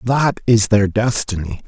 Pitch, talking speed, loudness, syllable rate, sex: 110 Hz, 145 wpm, -17 LUFS, 4.0 syllables/s, male